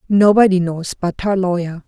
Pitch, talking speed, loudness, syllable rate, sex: 185 Hz, 160 wpm, -16 LUFS, 4.9 syllables/s, female